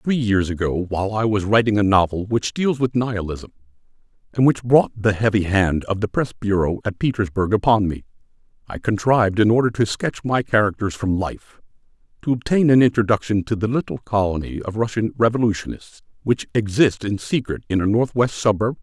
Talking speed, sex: 185 wpm, male